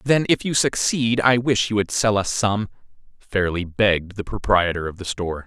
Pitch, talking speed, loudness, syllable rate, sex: 105 Hz, 200 wpm, -21 LUFS, 5.0 syllables/s, male